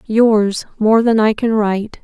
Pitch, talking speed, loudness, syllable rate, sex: 215 Hz, 175 wpm, -14 LUFS, 3.9 syllables/s, female